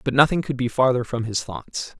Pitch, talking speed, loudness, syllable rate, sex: 125 Hz, 240 wpm, -22 LUFS, 5.3 syllables/s, male